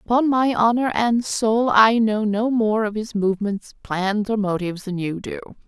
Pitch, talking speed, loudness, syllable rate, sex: 215 Hz, 190 wpm, -20 LUFS, 4.6 syllables/s, female